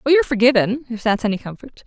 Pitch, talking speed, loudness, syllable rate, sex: 240 Hz, 195 wpm, -18 LUFS, 7.1 syllables/s, female